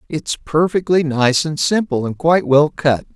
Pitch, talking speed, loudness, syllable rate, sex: 155 Hz, 170 wpm, -16 LUFS, 4.5 syllables/s, male